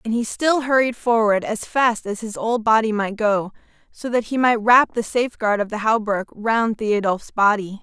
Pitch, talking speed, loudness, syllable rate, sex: 220 Hz, 200 wpm, -20 LUFS, 4.7 syllables/s, female